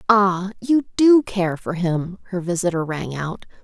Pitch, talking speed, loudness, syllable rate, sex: 190 Hz, 165 wpm, -20 LUFS, 3.9 syllables/s, female